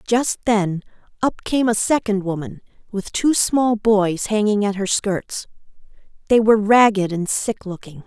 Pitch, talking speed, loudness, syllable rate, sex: 210 Hz, 155 wpm, -19 LUFS, 4.2 syllables/s, female